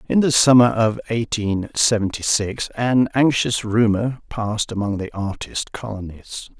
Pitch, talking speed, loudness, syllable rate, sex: 110 Hz, 135 wpm, -19 LUFS, 4.3 syllables/s, male